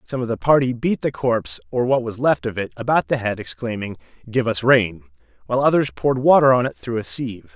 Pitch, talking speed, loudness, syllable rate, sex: 115 Hz, 230 wpm, -20 LUFS, 6.0 syllables/s, male